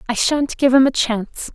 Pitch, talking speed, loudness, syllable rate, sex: 255 Hz, 235 wpm, -17 LUFS, 5.2 syllables/s, female